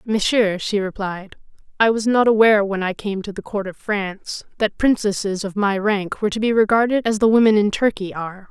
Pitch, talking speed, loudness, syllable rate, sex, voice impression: 205 Hz, 210 wpm, -19 LUFS, 5.5 syllables/s, female, feminine, slightly adult-like, slightly intellectual, calm, slightly kind